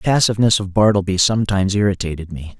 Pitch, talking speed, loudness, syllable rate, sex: 100 Hz, 160 wpm, -17 LUFS, 7.1 syllables/s, male